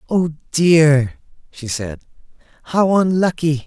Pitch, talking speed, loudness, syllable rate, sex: 155 Hz, 100 wpm, -17 LUFS, 3.3 syllables/s, male